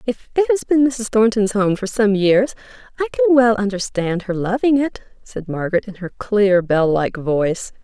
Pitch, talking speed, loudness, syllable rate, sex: 210 Hz, 190 wpm, -18 LUFS, 4.7 syllables/s, female